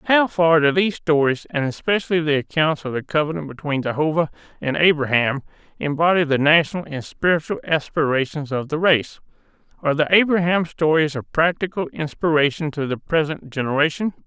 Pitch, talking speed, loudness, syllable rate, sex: 155 Hz, 150 wpm, -20 LUFS, 5.6 syllables/s, male